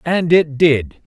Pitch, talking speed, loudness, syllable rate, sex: 155 Hz, 150 wpm, -15 LUFS, 3.2 syllables/s, male